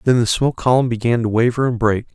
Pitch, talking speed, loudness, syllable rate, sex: 120 Hz, 250 wpm, -17 LUFS, 6.6 syllables/s, male